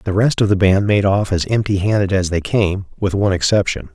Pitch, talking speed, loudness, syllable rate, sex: 95 Hz, 245 wpm, -16 LUFS, 5.6 syllables/s, male